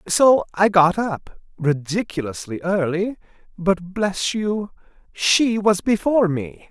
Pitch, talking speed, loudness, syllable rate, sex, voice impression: 190 Hz, 100 wpm, -20 LUFS, 3.7 syllables/s, male, masculine, adult-like, thick, tensed, powerful, bright, clear, cool, intellectual, friendly, wild, lively, slightly kind